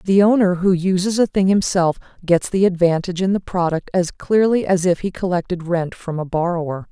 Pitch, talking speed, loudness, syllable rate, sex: 180 Hz, 200 wpm, -18 LUFS, 5.4 syllables/s, female